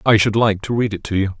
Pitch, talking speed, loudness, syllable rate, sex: 105 Hz, 345 wpm, -18 LUFS, 6.3 syllables/s, male